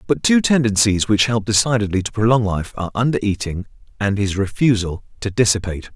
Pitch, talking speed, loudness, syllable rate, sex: 105 Hz, 170 wpm, -18 LUFS, 6.0 syllables/s, male